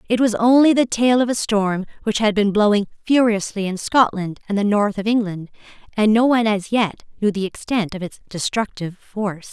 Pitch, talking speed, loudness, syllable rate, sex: 210 Hz, 200 wpm, -19 LUFS, 5.4 syllables/s, female